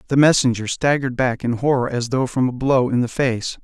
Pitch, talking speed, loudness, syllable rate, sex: 125 Hz, 230 wpm, -19 LUFS, 5.6 syllables/s, male